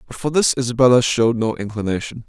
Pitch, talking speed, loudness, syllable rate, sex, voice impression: 120 Hz, 185 wpm, -18 LUFS, 6.7 syllables/s, male, masculine, adult-like, tensed, slightly powerful, hard, clear, cool, intellectual, calm, reassuring, wild, slightly modest